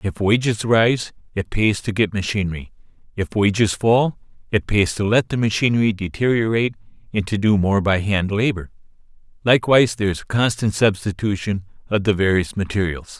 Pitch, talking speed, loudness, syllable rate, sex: 105 Hz, 155 wpm, -19 LUFS, 5.4 syllables/s, male